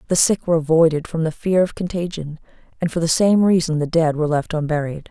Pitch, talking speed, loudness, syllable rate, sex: 165 Hz, 225 wpm, -19 LUFS, 6.2 syllables/s, female